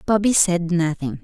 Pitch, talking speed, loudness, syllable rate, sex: 175 Hz, 145 wpm, -19 LUFS, 4.6 syllables/s, female